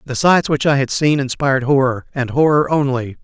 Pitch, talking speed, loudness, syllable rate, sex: 140 Hz, 205 wpm, -16 LUFS, 5.3 syllables/s, male